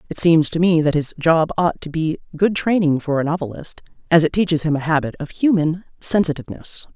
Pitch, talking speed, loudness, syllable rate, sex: 165 Hz, 205 wpm, -19 LUFS, 5.7 syllables/s, female